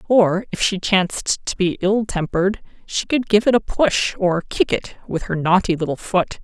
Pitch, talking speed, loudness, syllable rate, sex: 190 Hz, 205 wpm, -19 LUFS, 4.7 syllables/s, female